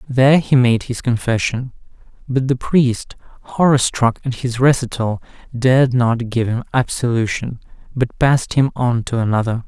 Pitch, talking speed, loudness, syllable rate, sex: 125 Hz, 150 wpm, -17 LUFS, 4.8 syllables/s, male